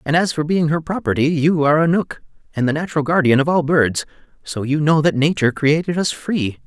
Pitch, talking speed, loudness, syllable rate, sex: 155 Hz, 225 wpm, -17 LUFS, 5.8 syllables/s, male